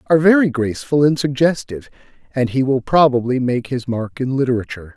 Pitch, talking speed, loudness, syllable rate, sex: 130 Hz, 170 wpm, -17 LUFS, 6.2 syllables/s, male